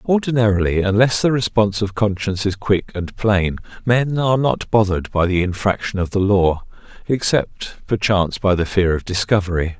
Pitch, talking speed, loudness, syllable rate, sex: 100 Hz, 165 wpm, -18 LUFS, 5.3 syllables/s, male